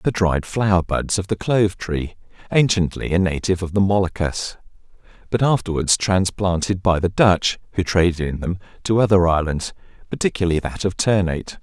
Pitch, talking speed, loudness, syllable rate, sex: 95 Hz, 160 wpm, -20 LUFS, 5.1 syllables/s, male